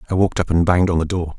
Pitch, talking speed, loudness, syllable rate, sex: 85 Hz, 345 wpm, -18 LUFS, 8.7 syllables/s, male